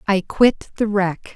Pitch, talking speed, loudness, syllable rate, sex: 200 Hz, 175 wpm, -19 LUFS, 3.8 syllables/s, female